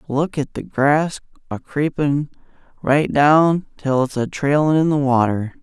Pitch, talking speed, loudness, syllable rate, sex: 145 Hz, 160 wpm, -18 LUFS, 4.0 syllables/s, male